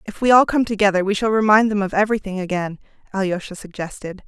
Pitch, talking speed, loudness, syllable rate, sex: 200 Hz, 195 wpm, -19 LUFS, 6.6 syllables/s, female